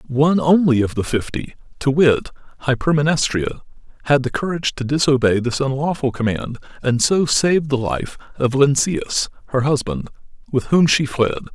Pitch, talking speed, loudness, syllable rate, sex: 135 Hz, 150 wpm, -18 LUFS, 5.2 syllables/s, male